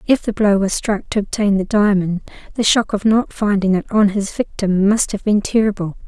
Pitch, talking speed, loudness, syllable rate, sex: 205 Hz, 215 wpm, -17 LUFS, 5.1 syllables/s, female